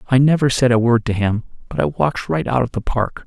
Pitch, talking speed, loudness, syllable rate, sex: 120 Hz, 275 wpm, -18 LUFS, 5.6 syllables/s, male